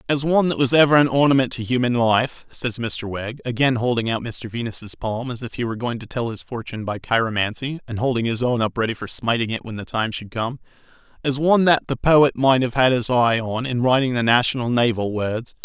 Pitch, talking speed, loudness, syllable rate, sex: 120 Hz, 235 wpm, -21 LUFS, 5.7 syllables/s, male